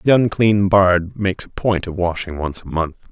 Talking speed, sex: 210 wpm, male